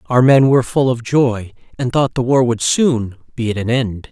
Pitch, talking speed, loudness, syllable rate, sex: 125 Hz, 235 wpm, -15 LUFS, 4.8 syllables/s, male